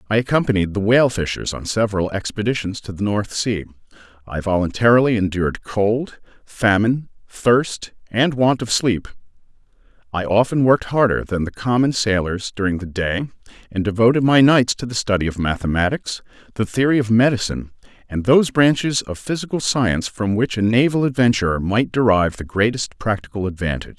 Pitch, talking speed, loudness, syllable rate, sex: 110 Hz, 160 wpm, -19 LUFS, 5.6 syllables/s, male